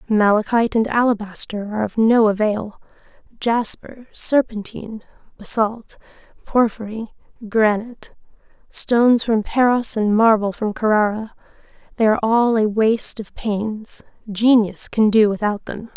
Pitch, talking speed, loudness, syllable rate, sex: 220 Hz, 115 wpm, -18 LUFS, 4.6 syllables/s, female